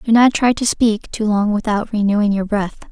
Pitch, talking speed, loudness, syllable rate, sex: 215 Hz, 225 wpm, -17 LUFS, 5.0 syllables/s, female